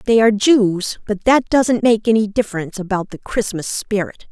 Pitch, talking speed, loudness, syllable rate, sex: 215 Hz, 180 wpm, -17 LUFS, 5.1 syllables/s, female